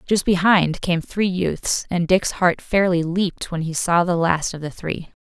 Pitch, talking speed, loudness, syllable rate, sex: 175 Hz, 205 wpm, -20 LUFS, 4.2 syllables/s, female